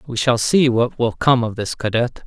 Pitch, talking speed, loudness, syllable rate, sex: 120 Hz, 240 wpm, -18 LUFS, 4.7 syllables/s, male